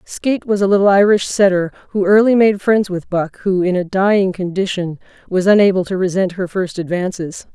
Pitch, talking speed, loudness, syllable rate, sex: 190 Hz, 190 wpm, -15 LUFS, 5.3 syllables/s, female